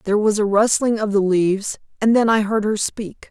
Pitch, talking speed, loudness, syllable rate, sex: 210 Hz, 220 wpm, -18 LUFS, 5.4 syllables/s, female